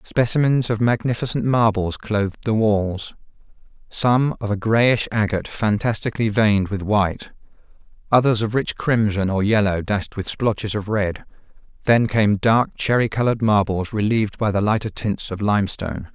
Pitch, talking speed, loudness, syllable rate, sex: 105 Hz, 150 wpm, -20 LUFS, 5.0 syllables/s, male